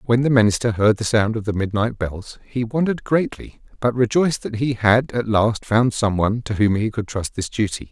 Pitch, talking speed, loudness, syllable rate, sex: 115 Hz, 225 wpm, -20 LUFS, 5.3 syllables/s, male